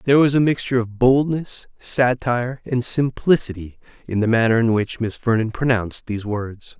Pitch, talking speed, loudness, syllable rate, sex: 120 Hz, 170 wpm, -20 LUFS, 5.3 syllables/s, male